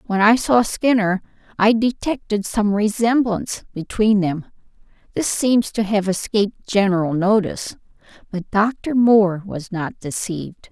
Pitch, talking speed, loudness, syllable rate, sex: 210 Hz, 125 wpm, -19 LUFS, 4.4 syllables/s, female